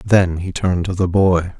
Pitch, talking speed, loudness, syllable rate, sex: 90 Hz, 225 wpm, -17 LUFS, 4.8 syllables/s, male